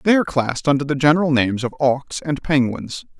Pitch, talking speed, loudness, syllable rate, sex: 145 Hz, 205 wpm, -19 LUFS, 6.6 syllables/s, male